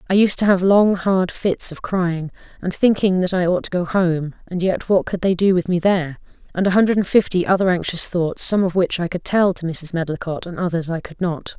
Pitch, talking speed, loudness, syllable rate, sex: 180 Hz, 240 wpm, -19 LUFS, 5.4 syllables/s, female